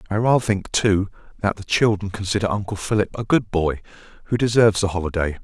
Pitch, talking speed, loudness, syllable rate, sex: 100 Hz, 190 wpm, -21 LUFS, 6.2 syllables/s, male